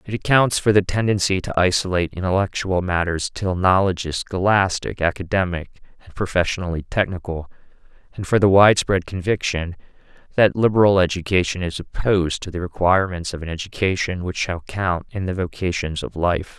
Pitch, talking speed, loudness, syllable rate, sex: 90 Hz, 150 wpm, -20 LUFS, 5.6 syllables/s, male